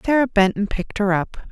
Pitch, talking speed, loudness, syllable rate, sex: 210 Hz, 235 wpm, -20 LUFS, 5.8 syllables/s, female